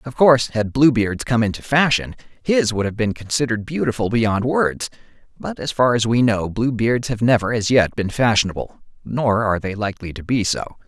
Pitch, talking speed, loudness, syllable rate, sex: 115 Hz, 205 wpm, -19 LUFS, 5.3 syllables/s, male